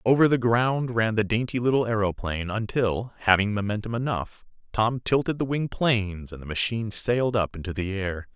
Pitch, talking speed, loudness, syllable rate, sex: 110 Hz, 180 wpm, -25 LUFS, 5.4 syllables/s, male